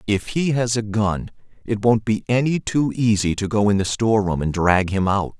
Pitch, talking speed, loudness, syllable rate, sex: 105 Hz, 220 wpm, -20 LUFS, 4.9 syllables/s, male